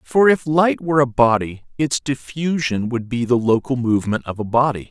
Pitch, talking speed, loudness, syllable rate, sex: 135 Hz, 195 wpm, -19 LUFS, 5.1 syllables/s, male